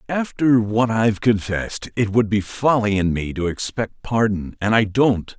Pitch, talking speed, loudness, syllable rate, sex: 110 Hz, 180 wpm, -20 LUFS, 4.5 syllables/s, male